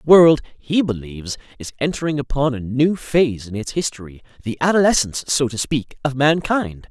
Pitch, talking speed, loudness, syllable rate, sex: 135 Hz, 175 wpm, -19 LUFS, 5.4 syllables/s, male